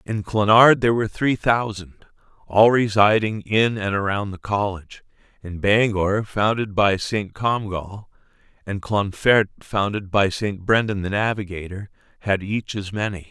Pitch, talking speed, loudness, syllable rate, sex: 105 Hz, 140 wpm, -20 LUFS, 4.4 syllables/s, male